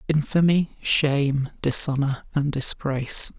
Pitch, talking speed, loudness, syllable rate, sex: 145 Hz, 90 wpm, -22 LUFS, 4.1 syllables/s, male